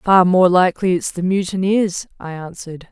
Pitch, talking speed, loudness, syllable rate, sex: 180 Hz, 165 wpm, -16 LUFS, 5.1 syllables/s, female